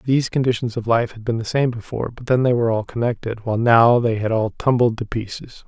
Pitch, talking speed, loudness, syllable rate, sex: 115 Hz, 245 wpm, -19 LUFS, 6.1 syllables/s, male